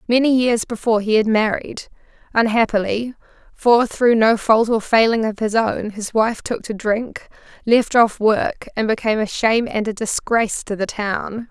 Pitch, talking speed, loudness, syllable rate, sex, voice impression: 225 Hz, 175 wpm, -18 LUFS, 4.7 syllables/s, female, slightly feminine, slightly adult-like, slightly clear, slightly sweet